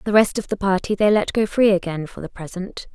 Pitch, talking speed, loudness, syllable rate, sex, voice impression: 195 Hz, 265 wpm, -20 LUFS, 5.7 syllables/s, female, feminine, adult-like, thin, relaxed, weak, slightly bright, soft, fluent, slightly intellectual, friendly, elegant, kind, modest